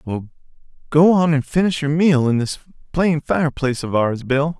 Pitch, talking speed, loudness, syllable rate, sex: 145 Hz, 185 wpm, -18 LUFS, 5.1 syllables/s, male